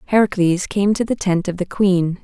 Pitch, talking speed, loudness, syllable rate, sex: 190 Hz, 215 wpm, -18 LUFS, 5.1 syllables/s, female